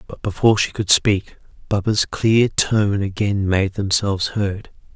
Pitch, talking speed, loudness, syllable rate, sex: 100 Hz, 145 wpm, -19 LUFS, 4.4 syllables/s, male